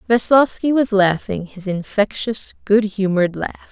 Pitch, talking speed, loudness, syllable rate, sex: 210 Hz, 130 wpm, -18 LUFS, 4.5 syllables/s, female